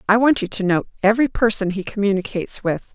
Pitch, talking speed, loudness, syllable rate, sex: 205 Hz, 205 wpm, -20 LUFS, 6.4 syllables/s, female